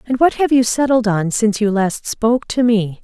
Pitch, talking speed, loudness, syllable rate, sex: 225 Hz, 235 wpm, -16 LUFS, 5.2 syllables/s, female